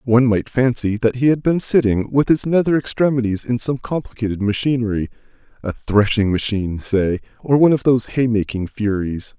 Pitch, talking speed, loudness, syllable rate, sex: 115 Hz, 175 wpm, -18 LUFS, 5.5 syllables/s, male